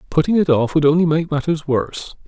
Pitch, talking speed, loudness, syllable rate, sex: 155 Hz, 210 wpm, -17 LUFS, 6.0 syllables/s, male